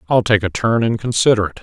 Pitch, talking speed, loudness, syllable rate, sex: 110 Hz, 260 wpm, -16 LUFS, 6.3 syllables/s, male